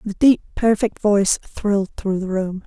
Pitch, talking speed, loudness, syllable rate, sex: 200 Hz, 180 wpm, -19 LUFS, 4.7 syllables/s, female